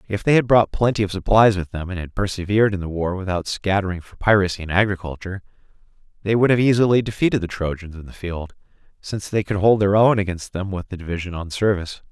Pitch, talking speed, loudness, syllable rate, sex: 95 Hz, 220 wpm, -20 LUFS, 6.5 syllables/s, male